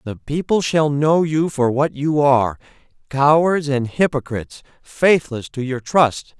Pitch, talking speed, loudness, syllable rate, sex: 140 Hz, 140 wpm, -18 LUFS, 4.1 syllables/s, male